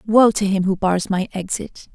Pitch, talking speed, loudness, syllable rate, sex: 195 Hz, 215 wpm, -19 LUFS, 4.7 syllables/s, female